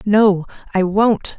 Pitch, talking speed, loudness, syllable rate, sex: 200 Hz, 130 wpm, -17 LUFS, 3.0 syllables/s, female